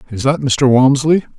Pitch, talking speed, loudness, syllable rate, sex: 135 Hz, 175 wpm, -13 LUFS, 4.9 syllables/s, male